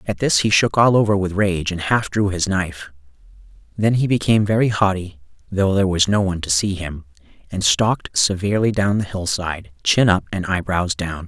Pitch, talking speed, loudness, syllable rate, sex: 95 Hz, 195 wpm, -19 LUFS, 5.5 syllables/s, male